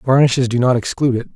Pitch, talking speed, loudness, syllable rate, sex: 125 Hz, 220 wpm, -16 LUFS, 7.1 syllables/s, male